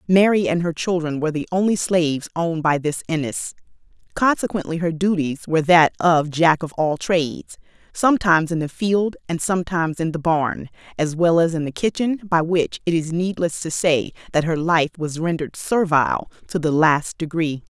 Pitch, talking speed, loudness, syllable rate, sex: 165 Hz, 185 wpm, -20 LUFS, 5.2 syllables/s, female